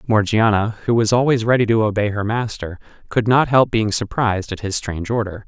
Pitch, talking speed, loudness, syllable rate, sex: 110 Hz, 195 wpm, -18 LUFS, 5.7 syllables/s, male